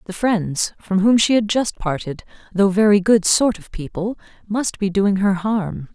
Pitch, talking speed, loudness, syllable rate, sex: 200 Hz, 190 wpm, -18 LUFS, 4.3 syllables/s, female